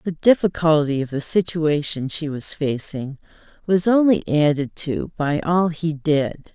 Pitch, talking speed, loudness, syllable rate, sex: 160 Hz, 145 wpm, -20 LUFS, 4.1 syllables/s, female